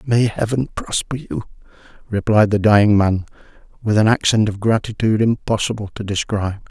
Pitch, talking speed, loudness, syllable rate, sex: 105 Hz, 145 wpm, -18 LUFS, 5.4 syllables/s, male